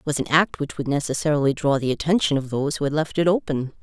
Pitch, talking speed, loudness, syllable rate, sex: 145 Hz, 265 wpm, -22 LUFS, 6.7 syllables/s, female